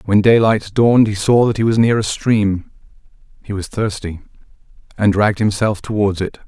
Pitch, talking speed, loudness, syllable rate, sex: 105 Hz, 175 wpm, -16 LUFS, 5.3 syllables/s, male